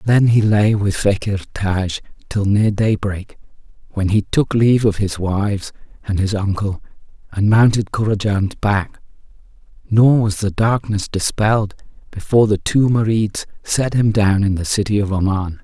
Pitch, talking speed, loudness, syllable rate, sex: 105 Hz, 155 wpm, -17 LUFS, 4.5 syllables/s, male